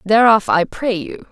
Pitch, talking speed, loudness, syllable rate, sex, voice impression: 205 Hz, 185 wpm, -15 LUFS, 4.4 syllables/s, female, very feminine, slightly young, slightly adult-like, very thin, tensed, slightly powerful, very bright, hard, very clear, very fluent, very cute, intellectual, very refreshing, slightly sincere, slightly calm, very friendly, very reassuring, very unique, elegant, slightly wild, sweet, very lively, slightly strict, slightly intense, light